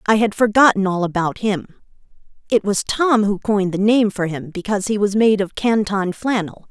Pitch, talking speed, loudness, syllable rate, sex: 205 Hz, 195 wpm, -18 LUFS, 5.1 syllables/s, female